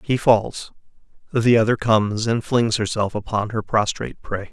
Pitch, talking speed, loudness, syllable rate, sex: 110 Hz, 160 wpm, -20 LUFS, 4.7 syllables/s, male